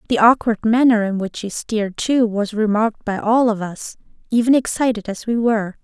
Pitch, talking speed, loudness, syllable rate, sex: 220 Hz, 195 wpm, -18 LUFS, 5.4 syllables/s, female